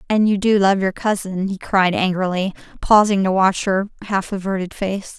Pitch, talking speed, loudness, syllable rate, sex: 195 Hz, 185 wpm, -18 LUFS, 4.8 syllables/s, female